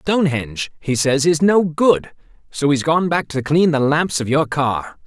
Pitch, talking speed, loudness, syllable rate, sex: 145 Hz, 200 wpm, -17 LUFS, 4.4 syllables/s, male